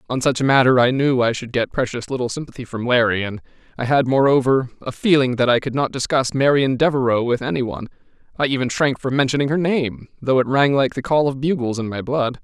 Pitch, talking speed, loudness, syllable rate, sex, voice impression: 130 Hz, 230 wpm, -19 LUFS, 6.0 syllables/s, male, masculine, adult-like, tensed, powerful, bright, clear, fluent, cool, slightly refreshing, friendly, wild, lively, slightly kind, intense